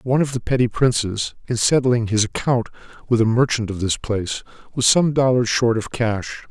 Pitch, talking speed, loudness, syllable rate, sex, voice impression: 120 Hz, 195 wpm, -19 LUFS, 5.3 syllables/s, male, masculine, middle-aged, tensed, slightly muffled, slightly halting, sincere, calm, mature, friendly, reassuring, wild, slightly lively, kind, slightly strict